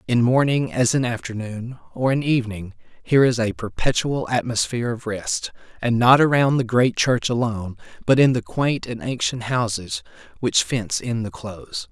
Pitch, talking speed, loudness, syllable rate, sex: 120 Hz, 170 wpm, -21 LUFS, 5.0 syllables/s, male